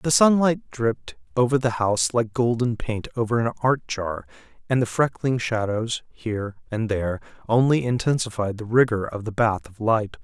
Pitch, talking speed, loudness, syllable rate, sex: 115 Hz, 170 wpm, -23 LUFS, 4.9 syllables/s, male